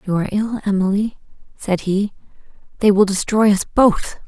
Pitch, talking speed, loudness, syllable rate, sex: 200 Hz, 155 wpm, -18 LUFS, 5.1 syllables/s, female